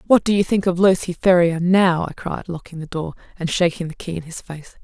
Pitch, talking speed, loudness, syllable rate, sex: 175 Hz, 250 wpm, -19 LUFS, 5.6 syllables/s, female